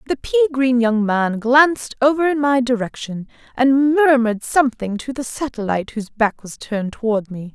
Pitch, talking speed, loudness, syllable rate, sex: 245 Hz, 175 wpm, -18 LUFS, 5.3 syllables/s, female